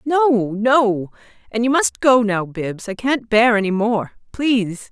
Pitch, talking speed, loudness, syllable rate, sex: 225 Hz, 160 wpm, -18 LUFS, 3.8 syllables/s, female